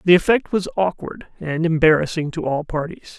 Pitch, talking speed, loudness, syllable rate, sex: 165 Hz, 170 wpm, -19 LUFS, 5.1 syllables/s, male